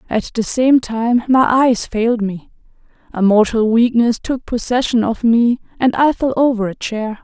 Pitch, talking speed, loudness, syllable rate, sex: 235 Hz, 175 wpm, -15 LUFS, 4.4 syllables/s, female